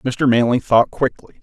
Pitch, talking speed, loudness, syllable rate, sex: 125 Hz, 170 wpm, -17 LUFS, 4.5 syllables/s, male